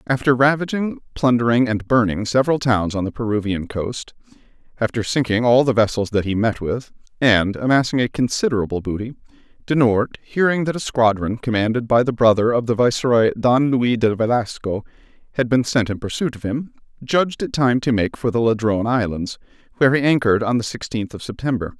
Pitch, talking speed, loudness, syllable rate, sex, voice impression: 120 Hz, 180 wpm, -19 LUFS, 5.7 syllables/s, male, masculine, middle-aged, tensed, slightly powerful, slightly bright, clear, fluent, intellectual, calm, friendly, slightly wild, kind